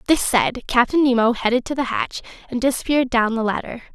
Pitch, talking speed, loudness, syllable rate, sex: 245 Hz, 200 wpm, -19 LUFS, 5.9 syllables/s, female